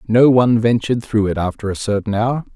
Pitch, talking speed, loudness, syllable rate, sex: 110 Hz, 210 wpm, -17 LUFS, 6.1 syllables/s, male